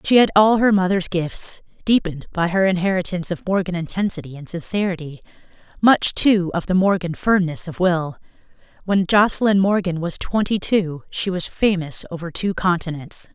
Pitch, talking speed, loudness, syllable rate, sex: 180 Hz, 155 wpm, -20 LUFS, 5.2 syllables/s, female